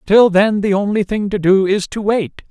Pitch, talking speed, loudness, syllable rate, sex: 200 Hz, 240 wpm, -15 LUFS, 4.6 syllables/s, male